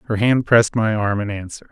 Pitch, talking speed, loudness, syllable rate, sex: 110 Hz, 245 wpm, -18 LUFS, 5.9 syllables/s, male